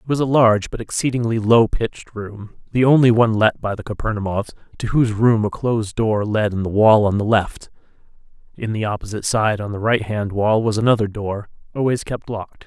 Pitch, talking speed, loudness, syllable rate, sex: 110 Hz, 210 wpm, -19 LUFS, 5.7 syllables/s, male